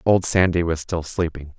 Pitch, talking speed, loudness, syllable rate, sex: 85 Hz, 190 wpm, -21 LUFS, 4.8 syllables/s, male